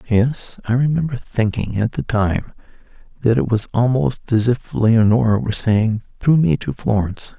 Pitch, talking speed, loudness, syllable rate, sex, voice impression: 115 Hz, 160 wpm, -18 LUFS, 4.7 syllables/s, male, masculine, adult-like, slightly thick, slightly dark, slightly cool, sincere, calm, slightly reassuring